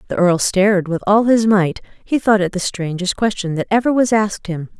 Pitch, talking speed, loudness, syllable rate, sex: 200 Hz, 225 wpm, -16 LUFS, 5.3 syllables/s, female